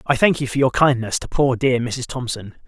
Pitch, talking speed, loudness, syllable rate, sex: 125 Hz, 245 wpm, -19 LUFS, 5.2 syllables/s, male